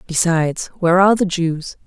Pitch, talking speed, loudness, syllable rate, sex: 175 Hz, 160 wpm, -17 LUFS, 5.9 syllables/s, female